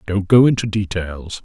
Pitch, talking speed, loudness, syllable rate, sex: 100 Hz, 165 wpm, -16 LUFS, 4.6 syllables/s, male